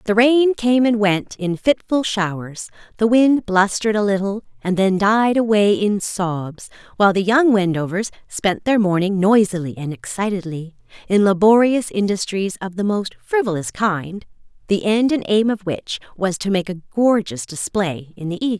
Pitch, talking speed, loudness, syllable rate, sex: 200 Hz, 170 wpm, -18 LUFS, 4.7 syllables/s, female